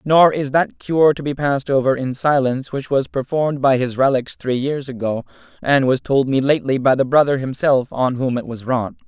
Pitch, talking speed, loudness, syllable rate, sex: 135 Hz, 220 wpm, -18 LUFS, 5.3 syllables/s, male